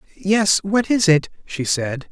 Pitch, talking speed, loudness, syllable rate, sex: 180 Hz, 170 wpm, -18 LUFS, 3.7 syllables/s, male